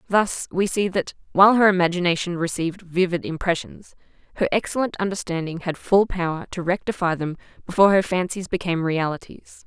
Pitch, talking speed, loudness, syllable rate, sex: 180 Hz, 150 wpm, -22 LUFS, 5.8 syllables/s, female